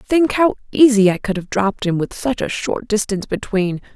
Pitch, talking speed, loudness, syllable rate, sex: 215 Hz, 210 wpm, -18 LUFS, 5.3 syllables/s, female